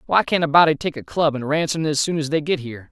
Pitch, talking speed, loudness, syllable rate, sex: 150 Hz, 330 wpm, -20 LUFS, 6.9 syllables/s, male